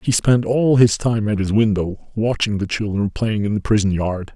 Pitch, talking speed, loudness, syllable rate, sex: 105 Hz, 220 wpm, -18 LUFS, 5.0 syllables/s, male